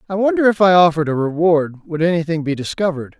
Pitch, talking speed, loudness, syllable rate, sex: 165 Hz, 205 wpm, -16 LUFS, 6.9 syllables/s, male